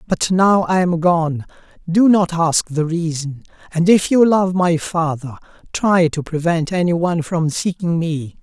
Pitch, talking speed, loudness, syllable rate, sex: 170 Hz, 170 wpm, -17 LUFS, 4.2 syllables/s, male